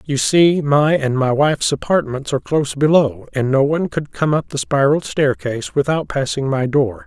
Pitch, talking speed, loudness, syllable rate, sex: 145 Hz, 195 wpm, -17 LUFS, 5.1 syllables/s, male